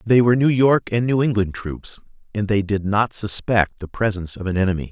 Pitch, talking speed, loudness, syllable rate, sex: 105 Hz, 220 wpm, -20 LUFS, 5.6 syllables/s, male